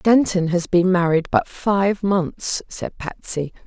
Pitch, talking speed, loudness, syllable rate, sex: 180 Hz, 145 wpm, -20 LUFS, 3.5 syllables/s, female